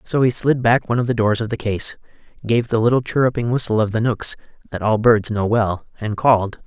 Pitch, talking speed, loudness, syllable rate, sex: 115 Hz, 235 wpm, -18 LUFS, 5.8 syllables/s, male